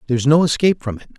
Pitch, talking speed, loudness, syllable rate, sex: 140 Hz, 255 wpm, -16 LUFS, 8.7 syllables/s, male